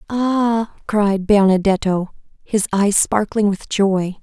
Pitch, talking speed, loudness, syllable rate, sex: 205 Hz, 115 wpm, -17 LUFS, 3.3 syllables/s, female